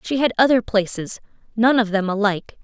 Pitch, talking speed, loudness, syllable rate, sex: 220 Hz, 180 wpm, -19 LUFS, 5.7 syllables/s, female